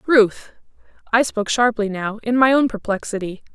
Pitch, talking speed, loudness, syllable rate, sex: 225 Hz, 150 wpm, -19 LUFS, 5.2 syllables/s, female